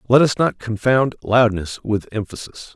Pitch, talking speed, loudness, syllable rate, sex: 115 Hz, 155 wpm, -19 LUFS, 4.6 syllables/s, male